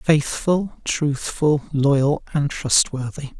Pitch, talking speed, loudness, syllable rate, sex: 145 Hz, 90 wpm, -20 LUFS, 3.0 syllables/s, male